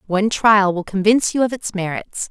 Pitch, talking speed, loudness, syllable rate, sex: 205 Hz, 210 wpm, -17 LUFS, 5.6 syllables/s, female